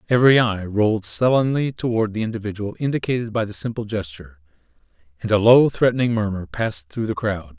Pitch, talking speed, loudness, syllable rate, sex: 105 Hz, 165 wpm, -20 LUFS, 6.1 syllables/s, male